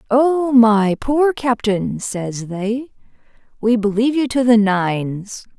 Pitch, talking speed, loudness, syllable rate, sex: 230 Hz, 130 wpm, -17 LUFS, 3.5 syllables/s, female